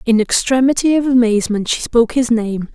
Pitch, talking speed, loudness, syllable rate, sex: 240 Hz, 175 wpm, -15 LUFS, 5.8 syllables/s, female